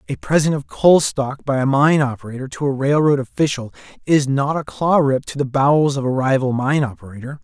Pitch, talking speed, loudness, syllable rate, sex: 135 Hz, 210 wpm, -18 LUFS, 5.5 syllables/s, male